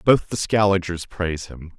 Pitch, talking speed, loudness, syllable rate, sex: 90 Hz, 170 wpm, -22 LUFS, 4.9 syllables/s, male